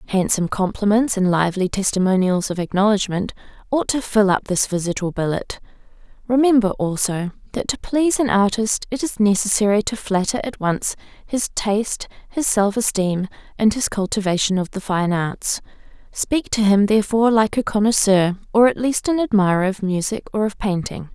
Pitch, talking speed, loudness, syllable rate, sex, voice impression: 205 Hz, 165 wpm, -19 LUFS, 5.3 syllables/s, female, feminine, slightly adult-like, slightly soft, slightly calm, friendly, slightly kind